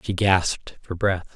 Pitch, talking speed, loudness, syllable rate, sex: 95 Hz, 175 wpm, -23 LUFS, 4.2 syllables/s, male